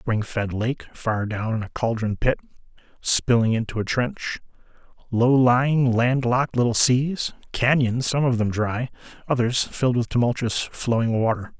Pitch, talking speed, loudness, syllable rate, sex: 120 Hz, 160 wpm, -22 LUFS, 4.7 syllables/s, male